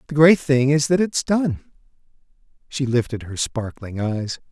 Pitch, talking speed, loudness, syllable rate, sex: 135 Hz, 160 wpm, -20 LUFS, 4.3 syllables/s, male